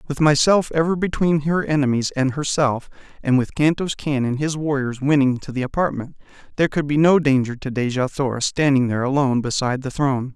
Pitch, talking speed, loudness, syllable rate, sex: 140 Hz, 190 wpm, -20 LUFS, 5.8 syllables/s, male